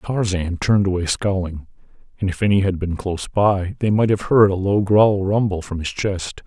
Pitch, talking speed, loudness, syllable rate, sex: 95 Hz, 205 wpm, -19 LUFS, 5.1 syllables/s, male